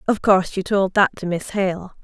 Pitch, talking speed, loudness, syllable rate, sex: 190 Hz, 235 wpm, -20 LUFS, 5.1 syllables/s, female